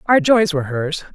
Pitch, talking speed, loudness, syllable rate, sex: 215 Hz, 210 wpm, -17 LUFS, 5.2 syllables/s, female